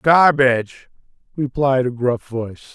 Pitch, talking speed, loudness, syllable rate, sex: 130 Hz, 110 wpm, -18 LUFS, 4.3 syllables/s, male